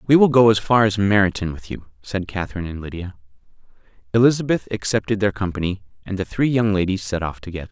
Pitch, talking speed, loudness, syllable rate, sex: 100 Hz, 195 wpm, -20 LUFS, 6.6 syllables/s, male